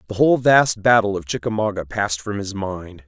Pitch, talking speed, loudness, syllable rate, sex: 100 Hz, 195 wpm, -19 LUFS, 5.6 syllables/s, male